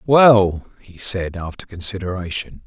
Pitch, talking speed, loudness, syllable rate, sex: 95 Hz, 115 wpm, -19 LUFS, 4.2 syllables/s, male